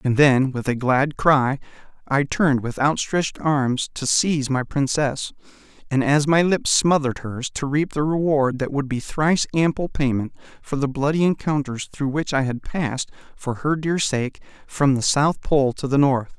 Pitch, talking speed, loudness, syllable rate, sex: 140 Hz, 185 wpm, -21 LUFS, 4.6 syllables/s, male